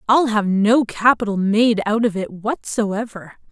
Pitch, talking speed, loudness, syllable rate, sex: 215 Hz, 155 wpm, -18 LUFS, 4.1 syllables/s, female